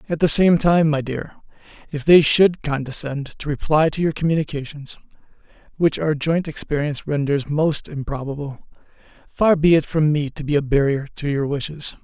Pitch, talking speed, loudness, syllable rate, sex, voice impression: 150 Hz, 160 wpm, -19 LUFS, 5.1 syllables/s, male, masculine, adult-like, slightly soft, refreshing, slightly sincere, slightly unique